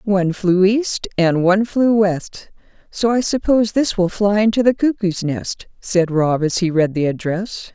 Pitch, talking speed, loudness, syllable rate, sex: 195 Hz, 185 wpm, -17 LUFS, 4.3 syllables/s, female